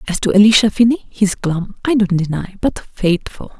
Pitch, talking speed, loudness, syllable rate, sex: 205 Hz, 185 wpm, -15 LUFS, 4.8 syllables/s, female